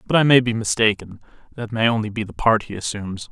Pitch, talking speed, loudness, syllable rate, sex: 110 Hz, 235 wpm, -20 LUFS, 6.4 syllables/s, male